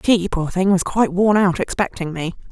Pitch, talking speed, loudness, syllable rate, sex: 185 Hz, 215 wpm, -19 LUFS, 5.4 syllables/s, female